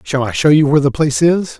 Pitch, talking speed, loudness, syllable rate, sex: 145 Hz, 300 wpm, -13 LUFS, 6.7 syllables/s, male